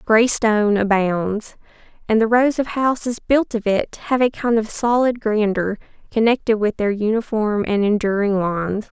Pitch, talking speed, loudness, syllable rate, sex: 220 Hz, 160 wpm, -19 LUFS, 4.6 syllables/s, female